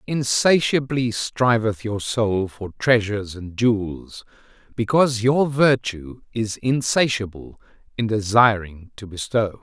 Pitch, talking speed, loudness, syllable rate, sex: 110 Hz, 105 wpm, -21 LUFS, 3.9 syllables/s, male